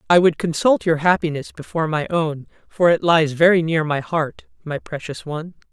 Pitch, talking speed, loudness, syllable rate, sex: 160 Hz, 190 wpm, -19 LUFS, 5.2 syllables/s, female